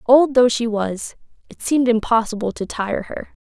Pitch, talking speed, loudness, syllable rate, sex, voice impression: 230 Hz, 175 wpm, -19 LUFS, 4.9 syllables/s, female, feminine, adult-like, tensed, powerful, bright, clear, fluent, intellectual, friendly, reassuring, unique, lively, slightly kind